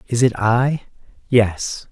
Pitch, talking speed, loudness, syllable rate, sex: 120 Hz, 125 wpm, -18 LUFS, 3.1 syllables/s, male